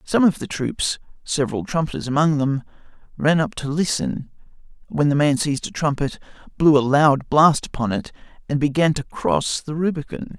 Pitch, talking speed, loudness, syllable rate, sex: 145 Hz, 175 wpm, -20 LUFS, 5.1 syllables/s, male